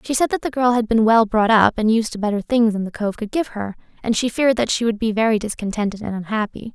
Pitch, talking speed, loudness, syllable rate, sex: 220 Hz, 285 wpm, -19 LUFS, 6.3 syllables/s, female